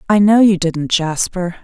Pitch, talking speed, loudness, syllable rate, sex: 185 Hz, 185 wpm, -14 LUFS, 4.3 syllables/s, female